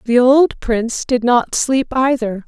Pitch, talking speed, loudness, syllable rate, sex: 245 Hz, 170 wpm, -15 LUFS, 3.9 syllables/s, female